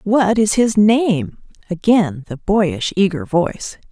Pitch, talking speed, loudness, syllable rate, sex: 195 Hz, 140 wpm, -16 LUFS, 3.6 syllables/s, female